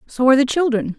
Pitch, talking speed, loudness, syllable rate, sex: 260 Hz, 245 wpm, -16 LUFS, 6.9 syllables/s, female